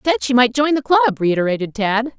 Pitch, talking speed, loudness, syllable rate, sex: 245 Hz, 245 wpm, -17 LUFS, 7.3 syllables/s, female